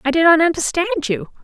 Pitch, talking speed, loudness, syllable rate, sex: 300 Hz, 210 wpm, -16 LUFS, 6.5 syllables/s, female